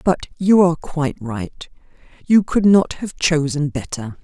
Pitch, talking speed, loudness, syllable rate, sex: 160 Hz, 155 wpm, -18 LUFS, 4.4 syllables/s, female